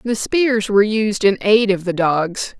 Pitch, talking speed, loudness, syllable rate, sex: 205 Hz, 210 wpm, -17 LUFS, 4.1 syllables/s, female